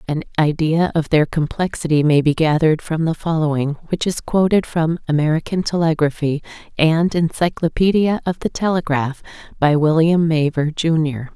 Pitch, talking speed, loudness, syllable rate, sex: 160 Hz, 135 wpm, -18 LUFS, 5.0 syllables/s, female